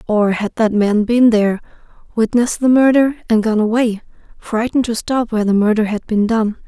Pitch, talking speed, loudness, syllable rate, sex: 225 Hz, 190 wpm, -15 LUFS, 5.6 syllables/s, female